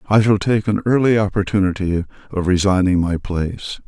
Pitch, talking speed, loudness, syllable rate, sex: 100 Hz, 155 wpm, -18 LUFS, 5.3 syllables/s, male